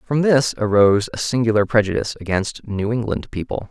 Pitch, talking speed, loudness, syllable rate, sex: 110 Hz, 160 wpm, -19 LUFS, 5.7 syllables/s, male